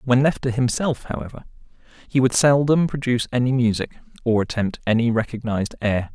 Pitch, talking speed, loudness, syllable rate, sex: 120 Hz, 155 wpm, -21 LUFS, 5.7 syllables/s, male